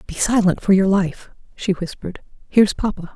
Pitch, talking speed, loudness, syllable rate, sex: 195 Hz, 170 wpm, -19 LUFS, 5.6 syllables/s, female